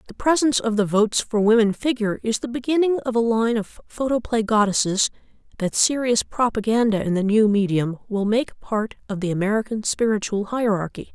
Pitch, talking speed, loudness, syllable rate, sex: 220 Hz, 170 wpm, -21 LUFS, 5.5 syllables/s, female